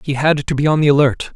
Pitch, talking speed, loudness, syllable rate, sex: 145 Hz, 310 wpm, -15 LUFS, 6.5 syllables/s, male